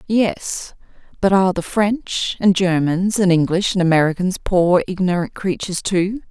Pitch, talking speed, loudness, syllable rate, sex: 185 Hz, 145 wpm, -18 LUFS, 4.5 syllables/s, female